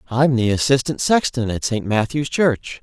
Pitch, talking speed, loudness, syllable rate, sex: 125 Hz, 170 wpm, -19 LUFS, 4.6 syllables/s, male